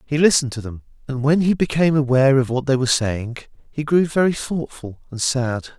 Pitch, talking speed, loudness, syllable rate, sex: 135 Hz, 205 wpm, -19 LUFS, 5.9 syllables/s, male